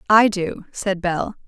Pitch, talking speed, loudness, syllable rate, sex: 195 Hz, 165 wpm, -21 LUFS, 3.5 syllables/s, female